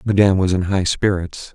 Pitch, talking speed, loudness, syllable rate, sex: 95 Hz, 195 wpm, -18 LUFS, 5.5 syllables/s, male